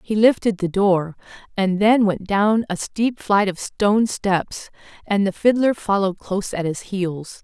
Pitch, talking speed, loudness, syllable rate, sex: 200 Hz, 180 wpm, -20 LUFS, 4.3 syllables/s, female